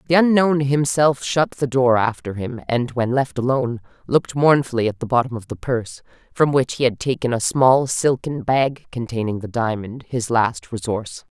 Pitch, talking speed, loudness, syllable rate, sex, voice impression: 125 Hz, 185 wpm, -20 LUFS, 5.0 syllables/s, female, very feminine, middle-aged, slightly thin, very tensed, very powerful, bright, very hard, very clear, very fluent, slightly raspy, very cool, very intellectual, refreshing, very sincere, slightly calm, slightly friendly, slightly reassuring, very unique, elegant, very wild, slightly sweet, lively, very strict, intense, sharp